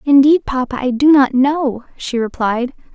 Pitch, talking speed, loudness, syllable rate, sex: 265 Hz, 165 wpm, -15 LUFS, 4.4 syllables/s, female